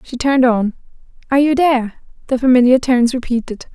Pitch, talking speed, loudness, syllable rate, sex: 250 Hz, 160 wpm, -15 LUFS, 6.6 syllables/s, female